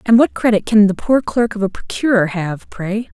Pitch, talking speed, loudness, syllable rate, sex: 210 Hz, 225 wpm, -16 LUFS, 5.0 syllables/s, female